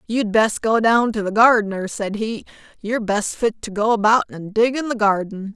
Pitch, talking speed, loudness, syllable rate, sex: 215 Hz, 215 wpm, -19 LUFS, 5.0 syllables/s, female